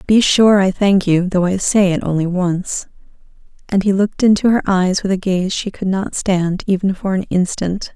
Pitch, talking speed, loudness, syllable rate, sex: 190 Hz, 210 wpm, -16 LUFS, 4.8 syllables/s, female